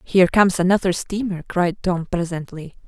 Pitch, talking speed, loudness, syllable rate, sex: 180 Hz, 145 wpm, -20 LUFS, 5.5 syllables/s, female